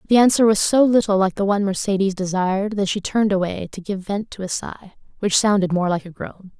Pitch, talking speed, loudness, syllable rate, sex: 195 Hz, 235 wpm, -19 LUFS, 6.0 syllables/s, female